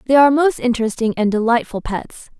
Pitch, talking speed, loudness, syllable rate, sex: 245 Hz, 175 wpm, -17 LUFS, 6.0 syllables/s, female